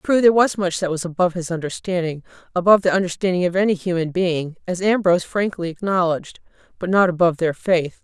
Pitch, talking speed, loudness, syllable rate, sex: 180 Hz, 170 wpm, -20 LUFS, 6.4 syllables/s, female